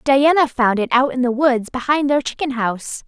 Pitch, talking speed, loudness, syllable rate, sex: 260 Hz, 215 wpm, -17 LUFS, 5.1 syllables/s, female